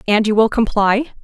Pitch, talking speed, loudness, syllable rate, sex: 220 Hz, 195 wpm, -15 LUFS, 5.3 syllables/s, female